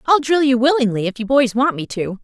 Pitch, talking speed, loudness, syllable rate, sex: 250 Hz, 270 wpm, -17 LUFS, 5.7 syllables/s, female